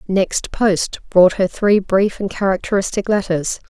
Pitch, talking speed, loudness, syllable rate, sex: 190 Hz, 145 wpm, -17 LUFS, 4.1 syllables/s, female